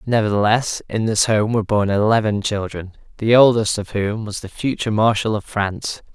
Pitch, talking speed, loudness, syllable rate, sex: 105 Hz, 175 wpm, -19 LUFS, 5.3 syllables/s, male